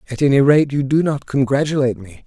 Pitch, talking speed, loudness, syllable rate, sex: 135 Hz, 210 wpm, -16 LUFS, 6.3 syllables/s, male